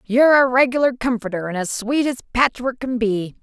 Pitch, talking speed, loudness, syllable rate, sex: 240 Hz, 195 wpm, -19 LUFS, 5.5 syllables/s, female